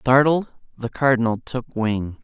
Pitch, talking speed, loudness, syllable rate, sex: 125 Hz, 135 wpm, -21 LUFS, 4.1 syllables/s, male